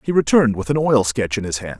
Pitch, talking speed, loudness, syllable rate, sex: 120 Hz, 300 wpm, -18 LUFS, 6.6 syllables/s, male